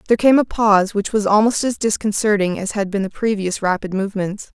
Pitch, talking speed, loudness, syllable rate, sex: 205 Hz, 210 wpm, -18 LUFS, 6.0 syllables/s, female